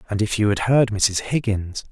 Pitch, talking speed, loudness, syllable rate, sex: 110 Hz, 220 wpm, -20 LUFS, 4.8 syllables/s, male